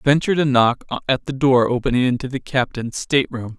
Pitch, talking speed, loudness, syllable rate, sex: 130 Hz, 200 wpm, -19 LUFS, 5.8 syllables/s, male